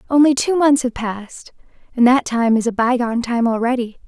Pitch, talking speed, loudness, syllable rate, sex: 245 Hz, 205 wpm, -17 LUFS, 5.3 syllables/s, female